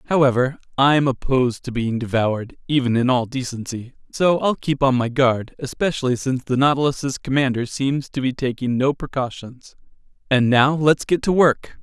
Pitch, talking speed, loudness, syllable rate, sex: 130 Hz, 165 wpm, -20 LUFS, 5.0 syllables/s, male